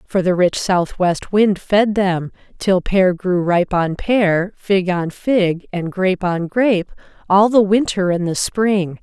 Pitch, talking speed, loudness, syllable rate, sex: 190 Hz, 175 wpm, -17 LUFS, 3.7 syllables/s, female